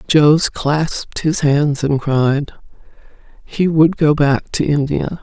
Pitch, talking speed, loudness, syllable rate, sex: 150 Hz, 140 wpm, -16 LUFS, 3.4 syllables/s, female